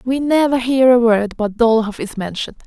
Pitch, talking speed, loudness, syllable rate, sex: 235 Hz, 205 wpm, -16 LUFS, 5.6 syllables/s, female